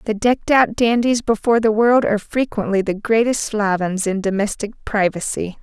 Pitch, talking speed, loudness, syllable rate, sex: 215 Hz, 160 wpm, -18 LUFS, 5.1 syllables/s, female